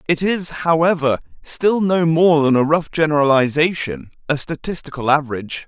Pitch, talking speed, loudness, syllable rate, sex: 155 Hz, 135 wpm, -17 LUFS, 5.1 syllables/s, male